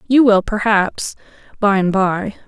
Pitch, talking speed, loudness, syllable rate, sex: 205 Hz, 120 wpm, -16 LUFS, 3.8 syllables/s, female